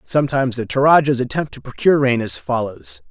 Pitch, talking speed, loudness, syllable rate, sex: 125 Hz, 175 wpm, -17 LUFS, 6.1 syllables/s, male